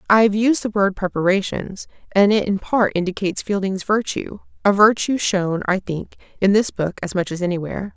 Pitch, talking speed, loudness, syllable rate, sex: 195 Hz, 190 wpm, -19 LUFS, 5.3 syllables/s, female